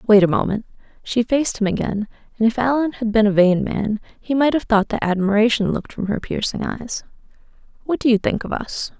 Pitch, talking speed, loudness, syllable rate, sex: 225 Hz, 215 wpm, -20 LUFS, 5.7 syllables/s, female